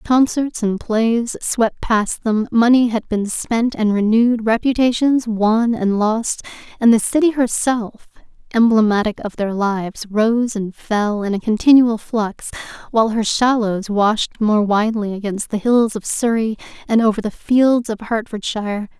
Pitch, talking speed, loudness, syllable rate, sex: 225 Hz, 150 wpm, -17 LUFS, 4.3 syllables/s, female